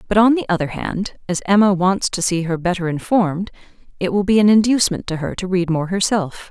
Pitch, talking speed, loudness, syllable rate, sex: 190 Hz, 220 wpm, -18 LUFS, 5.8 syllables/s, female